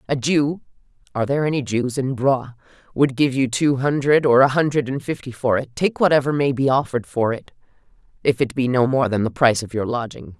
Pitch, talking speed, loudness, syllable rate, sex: 130 Hz, 200 wpm, -20 LUFS, 5.9 syllables/s, female